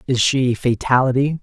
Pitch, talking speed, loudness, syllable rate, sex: 125 Hz, 125 wpm, -17 LUFS, 4.8 syllables/s, male